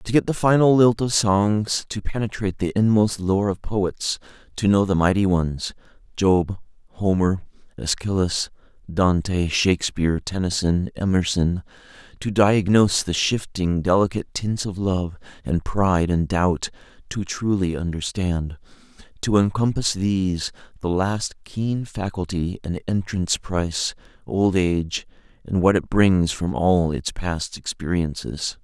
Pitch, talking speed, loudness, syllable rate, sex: 95 Hz, 130 wpm, -22 LUFS, 4.3 syllables/s, male